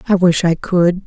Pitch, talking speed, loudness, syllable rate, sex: 175 Hz, 225 wpm, -15 LUFS, 4.5 syllables/s, female